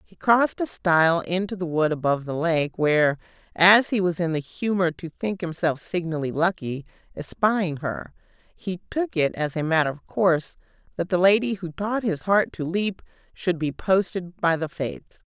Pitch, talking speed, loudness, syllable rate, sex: 175 Hz, 185 wpm, -23 LUFS, 4.8 syllables/s, female